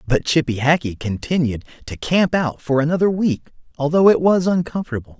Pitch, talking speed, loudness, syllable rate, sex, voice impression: 150 Hz, 160 wpm, -18 LUFS, 5.4 syllables/s, male, masculine, adult-like, tensed, powerful, bright, clear, cool, intellectual, friendly, wild, lively